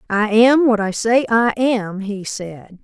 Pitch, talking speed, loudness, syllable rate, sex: 215 Hz, 190 wpm, -16 LUFS, 3.5 syllables/s, female